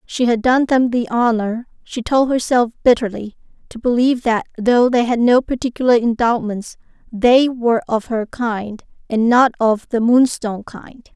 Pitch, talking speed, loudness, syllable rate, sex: 235 Hz, 160 wpm, -16 LUFS, 4.6 syllables/s, female